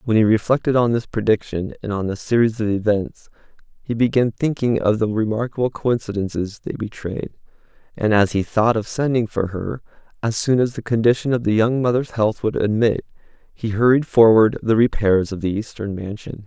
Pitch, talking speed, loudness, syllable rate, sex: 110 Hz, 180 wpm, -19 LUFS, 5.3 syllables/s, male